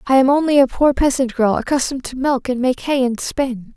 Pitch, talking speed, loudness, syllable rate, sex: 260 Hz, 240 wpm, -17 LUFS, 5.5 syllables/s, female